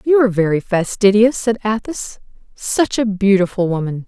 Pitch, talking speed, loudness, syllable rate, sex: 210 Hz, 145 wpm, -16 LUFS, 5.1 syllables/s, female